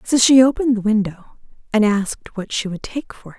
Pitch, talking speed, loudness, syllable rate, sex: 225 Hz, 230 wpm, -18 LUFS, 6.1 syllables/s, female